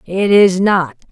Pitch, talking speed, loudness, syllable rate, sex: 185 Hz, 160 wpm, -12 LUFS, 3.5 syllables/s, female